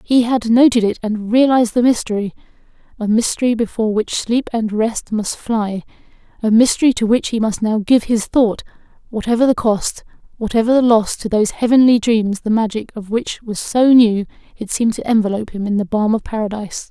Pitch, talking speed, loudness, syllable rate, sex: 225 Hz, 190 wpm, -16 LUFS, 5.6 syllables/s, female